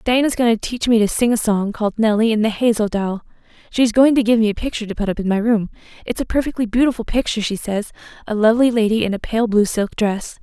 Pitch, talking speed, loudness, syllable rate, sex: 220 Hz, 255 wpm, -18 LUFS, 6.5 syllables/s, female